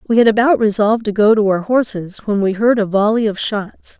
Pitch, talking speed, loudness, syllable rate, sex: 215 Hz, 240 wpm, -15 LUFS, 5.5 syllables/s, female